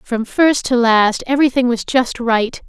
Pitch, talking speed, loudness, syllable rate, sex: 245 Hz, 180 wpm, -15 LUFS, 4.3 syllables/s, female